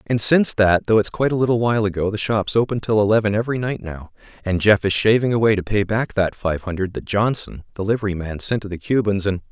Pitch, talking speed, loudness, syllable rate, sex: 105 Hz, 245 wpm, -19 LUFS, 6.3 syllables/s, male